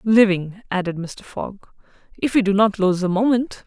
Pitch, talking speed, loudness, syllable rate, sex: 200 Hz, 180 wpm, -20 LUFS, 4.9 syllables/s, female